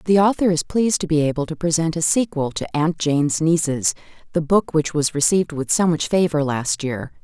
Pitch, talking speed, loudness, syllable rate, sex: 160 Hz, 215 wpm, -20 LUFS, 5.5 syllables/s, female